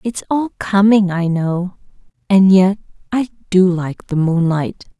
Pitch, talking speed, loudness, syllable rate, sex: 190 Hz, 145 wpm, -16 LUFS, 3.9 syllables/s, female